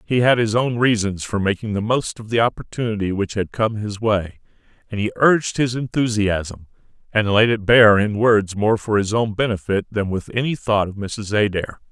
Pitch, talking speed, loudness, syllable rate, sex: 110 Hz, 200 wpm, -19 LUFS, 5.0 syllables/s, male